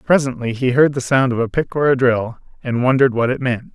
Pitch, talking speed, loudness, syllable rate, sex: 125 Hz, 255 wpm, -17 LUFS, 6.1 syllables/s, male